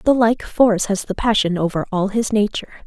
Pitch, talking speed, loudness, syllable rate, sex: 210 Hz, 210 wpm, -18 LUFS, 5.8 syllables/s, female